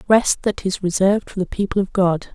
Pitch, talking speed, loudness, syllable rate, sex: 190 Hz, 230 wpm, -19 LUFS, 5.6 syllables/s, female